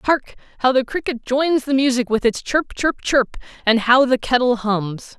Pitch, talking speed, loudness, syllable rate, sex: 250 Hz, 195 wpm, -19 LUFS, 4.7 syllables/s, female